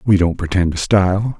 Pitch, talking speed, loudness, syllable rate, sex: 95 Hz, 215 wpm, -16 LUFS, 5.4 syllables/s, male